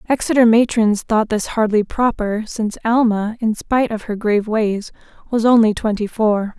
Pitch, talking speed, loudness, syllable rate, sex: 220 Hz, 165 wpm, -17 LUFS, 4.9 syllables/s, female